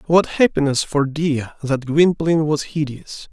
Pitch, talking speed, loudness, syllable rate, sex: 150 Hz, 145 wpm, -19 LUFS, 4.4 syllables/s, male